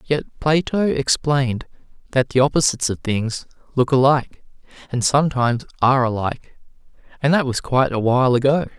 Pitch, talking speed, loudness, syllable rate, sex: 135 Hz, 135 wpm, -19 LUFS, 5.9 syllables/s, male